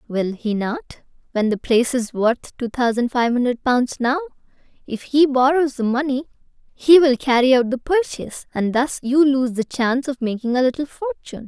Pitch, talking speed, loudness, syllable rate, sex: 255 Hz, 185 wpm, -19 LUFS, 5.2 syllables/s, female